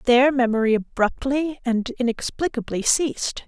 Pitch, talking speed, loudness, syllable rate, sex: 250 Hz, 105 wpm, -22 LUFS, 5.0 syllables/s, female